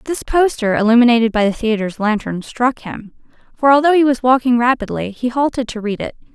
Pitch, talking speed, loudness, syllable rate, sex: 240 Hz, 190 wpm, -16 LUFS, 5.8 syllables/s, female